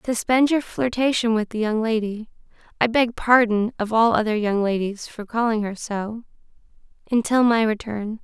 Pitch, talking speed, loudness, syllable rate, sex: 225 Hz, 160 wpm, -21 LUFS, 4.4 syllables/s, female